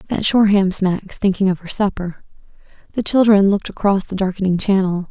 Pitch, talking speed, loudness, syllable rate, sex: 195 Hz, 165 wpm, -17 LUFS, 5.7 syllables/s, female